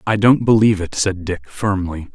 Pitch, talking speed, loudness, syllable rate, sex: 100 Hz, 195 wpm, -17 LUFS, 5.2 syllables/s, male